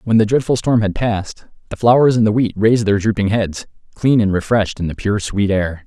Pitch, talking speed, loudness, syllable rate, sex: 105 Hz, 235 wpm, -16 LUFS, 5.7 syllables/s, male